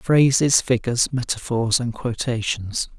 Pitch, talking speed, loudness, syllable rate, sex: 120 Hz, 100 wpm, -21 LUFS, 4.2 syllables/s, male